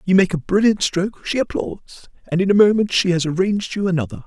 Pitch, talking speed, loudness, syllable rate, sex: 185 Hz, 225 wpm, -18 LUFS, 6.5 syllables/s, male